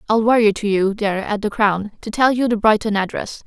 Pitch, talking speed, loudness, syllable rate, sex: 210 Hz, 245 wpm, -18 LUFS, 5.3 syllables/s, female